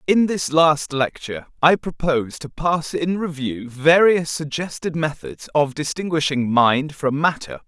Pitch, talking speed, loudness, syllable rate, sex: 150 Hz, 140 wpm, -20 LUFS, 4.3 syllables/s, male